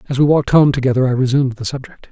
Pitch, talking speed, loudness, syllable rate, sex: 135 Hz, 255 wpm, -15 LUFS, 7.8 syllables/s, male